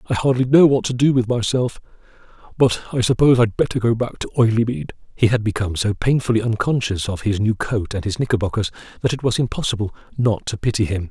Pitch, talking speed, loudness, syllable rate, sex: 115 Hz, 205 wpm, -19 LUFS, 6.3 syllables/s, male